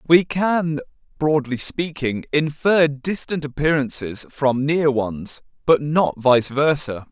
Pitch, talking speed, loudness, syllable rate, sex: 145 Hz, 120 wpm, -20 LUFS, 3.6 syllables/s, male